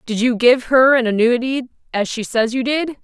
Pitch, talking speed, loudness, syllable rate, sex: 245 Hz, 215 wpm, -16 LUFS, 5.0 syllables/s, female